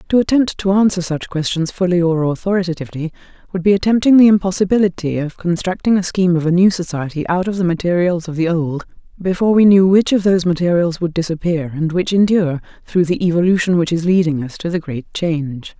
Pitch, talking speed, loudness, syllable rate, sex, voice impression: 175 Hz, 200 wpm, -16 LUFS, 6.2 syllables/s, female, very feminine, slightly gender-neutral, very adult-like, slightly thin, tensed, very powerful, dark, very hard, very clear, very fluent, slightly raspy, cool, very intellectual, very refreshing, sincere, calm, very friendly, very reassuring, very unique, very elegant, wild, very sweet, slightly lively, kind, slightly intense